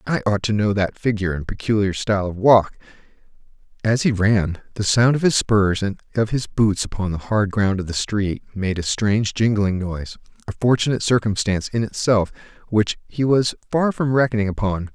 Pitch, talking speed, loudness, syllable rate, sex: 105 Hz, 190 wpm, -20 LUFS, 5.4 syllables/s, male